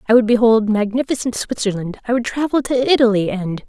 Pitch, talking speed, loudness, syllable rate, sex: 230 Hz, 180 wpm, -17 LUFS, 6.0 syllables/s, female